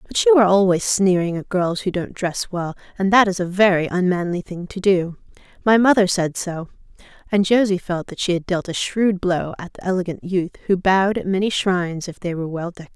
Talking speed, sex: 225 wpm, female